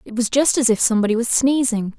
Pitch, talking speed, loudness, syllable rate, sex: 235 Hz, 240 wpm, -17 LUFS, 6.4 syllables/s, female